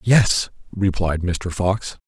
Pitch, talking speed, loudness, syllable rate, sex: 95 Hz, 115 wpm, -21 LUFS, 2.9 syllables/s, male